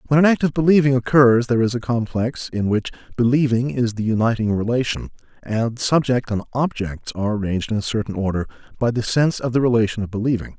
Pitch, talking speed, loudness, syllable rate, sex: 120 Hz, 200 wpm, -20 LUFS, 6.2 syllables/s, male